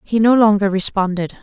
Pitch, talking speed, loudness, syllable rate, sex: 205 Hz, 170 wpm, -15 LUFS, 5.3 syllables/s, female